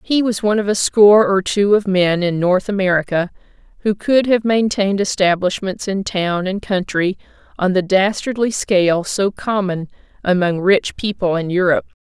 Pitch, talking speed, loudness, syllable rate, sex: 195 Hz, 165 wpm, -17 LUFS, 4.9 syllables/s, female